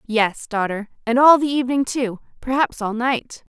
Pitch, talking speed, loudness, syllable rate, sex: 245 Hz, 170 wpm, -19 LUFS, 4.8 syllables/s, female